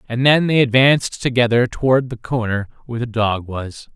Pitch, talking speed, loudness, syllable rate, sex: 120 Hz, 180 wpm, -17 LUFS, 5.3 syllables/s, male